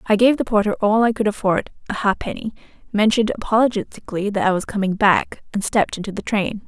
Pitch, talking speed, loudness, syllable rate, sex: 210 Hz, 190 wpm, -20 LUFS, 6.3 syllables/s, female